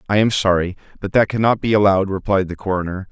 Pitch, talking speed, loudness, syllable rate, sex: 100 Hz, 210 wpm, -18 LUFS, 6.7 syllables/s, male